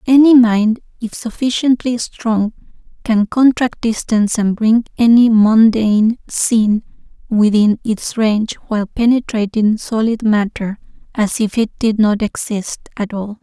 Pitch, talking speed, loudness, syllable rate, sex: 220 Hz, 125 wpm, -15 LUFS, 4.2 syllables/s, female